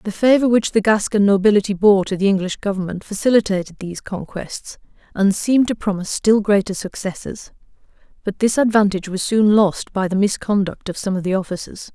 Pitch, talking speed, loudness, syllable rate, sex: 200 Hz, 175 wpm, -18 LUFS, 5.8 syllables/s, female